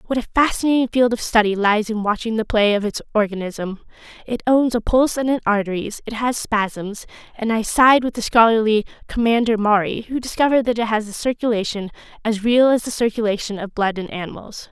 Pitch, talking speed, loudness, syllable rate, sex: 225 Hz, 190 wpm, -19 LUFS, 5.6 syllables/s, female